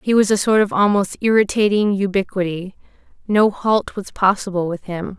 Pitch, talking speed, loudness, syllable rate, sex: 195 Hz, 160 wpm, -18 LUFS, 5.0 syllables/s, female